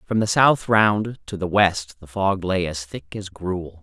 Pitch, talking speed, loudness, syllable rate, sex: 95 Hz, 220 wpm, -21 LUFS, 3.8 syllables/s, male